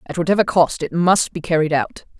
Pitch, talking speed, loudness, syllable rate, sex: 165 Hz, 220 wpm, -18 LUFS, 5.7 syllables/s, female